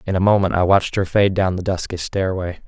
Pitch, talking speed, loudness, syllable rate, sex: 95 Hz, 245 wpm, -19 LUFS, 6.0 syllables/s, male